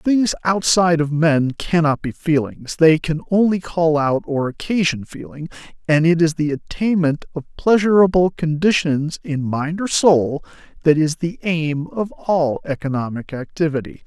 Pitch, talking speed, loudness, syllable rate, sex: 160 Hz, 150 wpm, -18 LUFS, 4.4 syllables/s, male